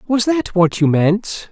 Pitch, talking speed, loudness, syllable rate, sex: 205 Hz, 200 wpm, -16 LUFS, 3.7 syllables/s, male